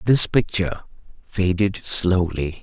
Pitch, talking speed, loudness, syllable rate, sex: 95 Hz, 90 wpm, -20 LUFS, 3.9 syllables/s, male